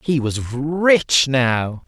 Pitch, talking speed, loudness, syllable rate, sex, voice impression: 140 Hz, 130 wpm, -18 LUFS, 2.3 syllables/s, male, masculine, gender-neutral, slightly middle-aged, slightly thick, very tensed, powerful, bright, soft, very clear, fluent, slightly cool, intellectual, very refreshing, sincere, calm, friendly, slightly reassuring, very unique, slightly elegant, wild, slightly sweet, very lively, kind, intense